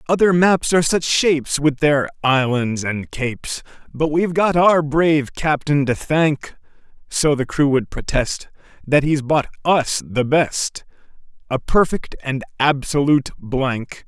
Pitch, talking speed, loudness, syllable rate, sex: 145 Hz, 145 wpm, -18 LUFS, 3.8 syllables/s, male